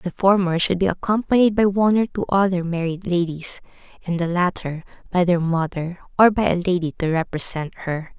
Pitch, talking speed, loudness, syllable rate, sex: 180 Hz, 185 wpm, -20 LUFS, 5.3 syllables/s, female